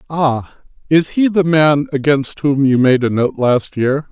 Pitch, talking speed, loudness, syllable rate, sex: 145 Hz, 190 wpm, -15 LUFS, 4.0 syllables/s, male